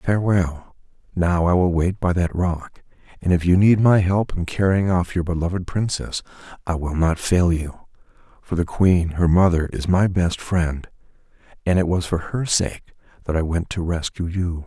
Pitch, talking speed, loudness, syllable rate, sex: 90 Hz, 190 wpm, -21 LUFS, 4.6 syllables/s, male